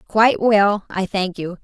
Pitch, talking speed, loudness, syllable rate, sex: 200 Hz, 185 wpm, -18 LUFS, 4.3 syllables/s, female